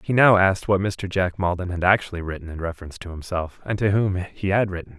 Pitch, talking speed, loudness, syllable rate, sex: 95 Hz, 240 wpm, -22 LUFS, 6.2 syllables/s, male